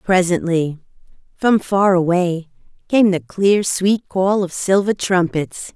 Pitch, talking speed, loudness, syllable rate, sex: 185 Hz, 125 wpm, -17 LUFS, 3.6 syllables/s, female